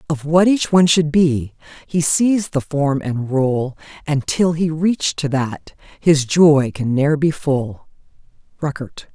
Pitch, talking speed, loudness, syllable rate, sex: 150 Hz, 165 wpm, -17 LUFS, 3.8 syllables/s, female